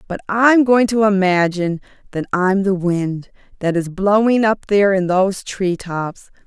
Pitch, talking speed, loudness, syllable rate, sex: 195 Hz, 165 wpm, -17 LUFS, 4.5 syllables/s, female